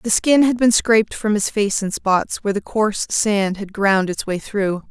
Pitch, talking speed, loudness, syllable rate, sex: 205 Hz, 230 wpm, -18 LUFS, 4.6 syllables/s, female